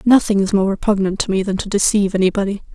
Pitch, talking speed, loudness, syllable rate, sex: 200 Hz, 220 wpm, -17 LUFS, 7.1 syllables/s, female